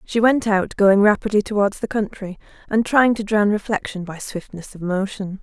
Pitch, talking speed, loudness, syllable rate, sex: 205 Hz, 190 wpm, -19 LUFS, 5.0 syllables/s, female